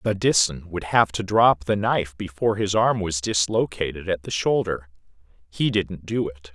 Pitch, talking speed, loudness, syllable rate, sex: 95 Hz, 185 wpm, -23 LUFS, 4.8 syllables/s, male